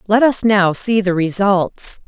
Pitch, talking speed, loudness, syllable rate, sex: 200 Hz, 175 wpm, -15 LUFS, 3.7 syllables/s, female